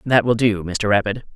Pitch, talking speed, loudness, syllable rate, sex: 110 Hz, 220 wpm, -19 LUFS, 5.2 syllables/s, male